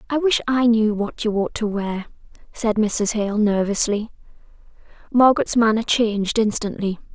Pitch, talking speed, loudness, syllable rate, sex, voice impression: 220 Hz, 145 wpm, -20 LUFS, 4.7 syllables/s, female, feminine, young, slightly soft, cute, friendly, slightly kind